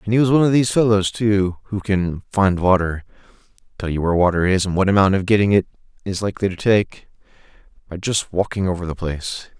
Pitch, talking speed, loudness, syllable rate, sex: 95 Hz, 200 wpm, -19 LUFS, 6.2 syllables/s, male